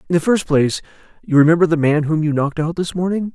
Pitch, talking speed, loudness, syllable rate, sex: 160 Hz, 250 wpm, -17 LUFS, 6.9 syllables/s, male